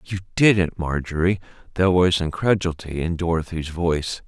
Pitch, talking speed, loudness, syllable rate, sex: 85 Hz, 125 wpm, -21 LUFS, 5.3 syllables/s, male